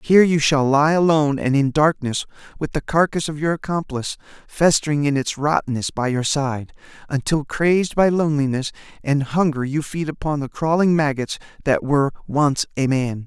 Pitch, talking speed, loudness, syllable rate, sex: 145 Hz, 170 wpm, -20 LUFS, 5.3 syllables/s, male